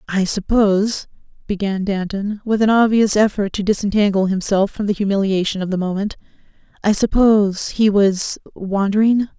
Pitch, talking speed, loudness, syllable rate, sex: 205 Hz, 135 wpm, -18 LUFS, 5.1 syllables/s, female